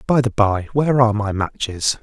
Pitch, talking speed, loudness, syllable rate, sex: 115 Hz, 205 wpm, -18 LUFS, 5.4 syllables/s, male